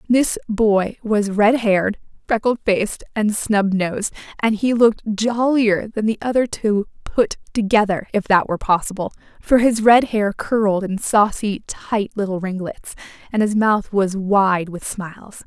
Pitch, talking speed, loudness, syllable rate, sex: 210 Hz, 160 wpm, -19 LUFS, 4.4 syllables/s, female